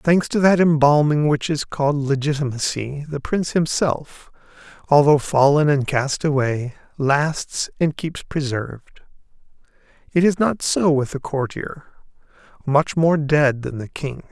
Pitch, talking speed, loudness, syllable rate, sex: 145 Hz, 140 wpm, -19 LUFS, 4.2 syllables/s, male